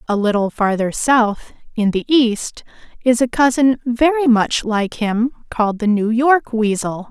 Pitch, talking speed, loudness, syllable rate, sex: 230 Hz, 160 wpm, -17 LUFS, 4.1 syllables/s, female